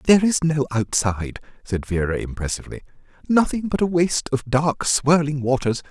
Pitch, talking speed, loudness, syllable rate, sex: 140 Hz, 150 wpm, -21 LUFS, 5.5 syllables/s, male